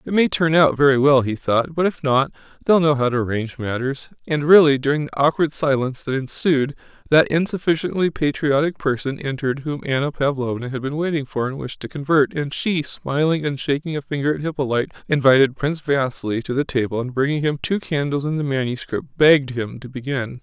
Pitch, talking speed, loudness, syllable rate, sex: 140 Hz, 200 wpm, -20 LUFS, 5.8 syllables/s, male